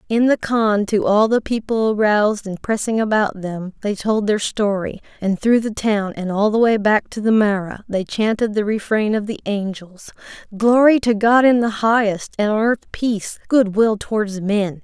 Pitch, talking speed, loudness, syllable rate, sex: 215 Hz, 200 wpm, -18 LUFS, 4.6 syllables/s, female